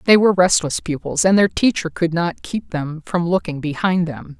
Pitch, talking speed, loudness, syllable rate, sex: 160 Hz, 205 wpm, -18 LUFS, 4.9 syllables/s, female